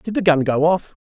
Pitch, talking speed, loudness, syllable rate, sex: 160 Hz, 290 wpm, -17 LUFS, 5.4 syllables/s, male